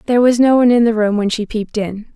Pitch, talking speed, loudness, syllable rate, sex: 225 Hz, 305 wpm, -14 LUFS, 7.2 syllables/s, female